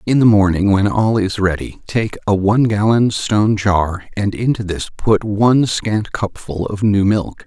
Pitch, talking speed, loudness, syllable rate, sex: 105 Hz, 185 wpm, -16 LUFS, 4.5 syllables/s, male